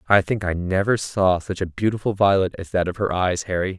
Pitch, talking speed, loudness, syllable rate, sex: 95 Hz, 240 wpm, -21 LUFS, 5.6 syllables/s, male